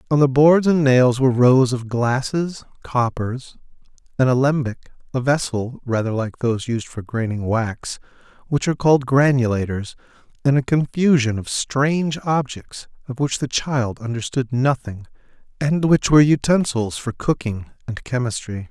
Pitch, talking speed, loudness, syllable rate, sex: 130 Hz, 145 wpm, -19 LUFS, 4.6 syllables/s, male